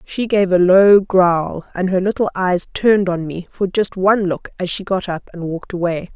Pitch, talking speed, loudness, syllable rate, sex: 185 Hz, 225 wpm, -17 LUFS, 4.9 syllables/s, female